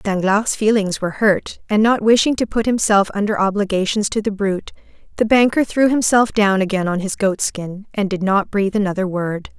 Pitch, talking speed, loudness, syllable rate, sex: 205 Hz, 195 wpm, -17 LUFS, 5.3 syllables/s, female